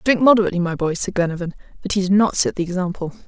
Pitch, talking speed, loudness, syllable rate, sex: 185 Hz, 240 wpm, -19 LUFS, 7.5 syllables/s, female